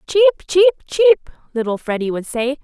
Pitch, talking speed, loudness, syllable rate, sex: 305 Hz, 160 wpm, -17 LUFS, 4.9 syllables/s, female